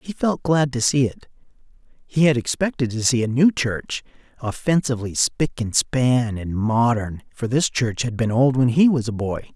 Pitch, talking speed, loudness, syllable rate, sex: 125 Hz, 195 wpm, -21 LUFS, 4.7 syllables/s, male